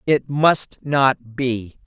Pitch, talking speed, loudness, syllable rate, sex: 135 Hz, 130 wpm, -19 LUFS, 2.5 syllables/s, female